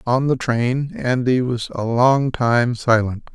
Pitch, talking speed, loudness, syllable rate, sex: 125 Hz, 160 wpm, -19 LUFS, 3.6 syllables/s, male